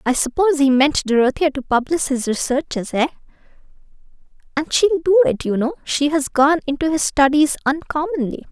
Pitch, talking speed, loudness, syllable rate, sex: 290 Hz, 160 wpm, -18 LUFS, 5.5 syllables/s, female